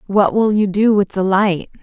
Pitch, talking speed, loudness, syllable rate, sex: 200 Hz, 230 wpm, -15 LUFS, 4.5 syllables/s, female